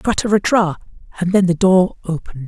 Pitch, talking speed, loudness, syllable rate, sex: 180 Hz, 120 wpm, -16 LUFS, 5.7 syllables/s, male